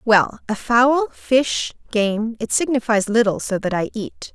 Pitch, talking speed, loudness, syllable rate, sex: 230 Hz, 150 wpm, -19 LUFS, 3.9 syllables/s, female